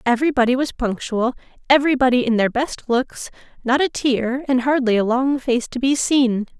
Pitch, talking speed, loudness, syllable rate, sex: 255 Hz, 190 wpm, -19 LUFS, 5.2 syllables/s, female